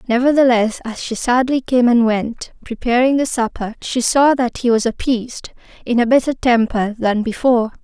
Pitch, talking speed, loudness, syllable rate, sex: 240 Hz, 170 wpm, -16 LUFS, 5.0 syllables/s, female